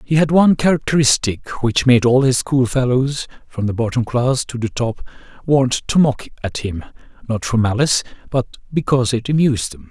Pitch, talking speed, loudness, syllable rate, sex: 125 Hz, 175 wpm, -17 LUFS, 5.2 syllables/s, male